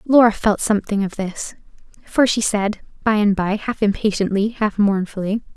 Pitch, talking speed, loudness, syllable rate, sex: 210 Hz, 160 wpm, -19 LUFS, 5.0 syllables/s, female